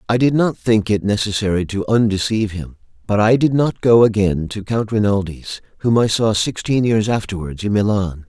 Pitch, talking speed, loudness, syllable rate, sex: 105 Hz, 190 wpm, -17 LUFS, 5.2 syllables/s, male